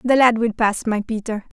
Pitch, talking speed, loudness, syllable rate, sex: 225 Hz, 225 wpm, -19 LUFS, 5.1 syllables/s, female